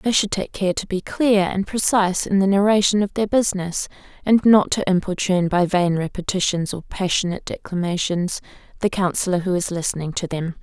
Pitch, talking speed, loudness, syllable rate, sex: 190 Hz, 180 wpm, -20 LUFS, 5.6 syllables/s, female